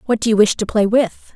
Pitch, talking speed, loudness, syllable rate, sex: 215 Hz, 310 wpm, -16 LUFS, 5.8 syllables/s, female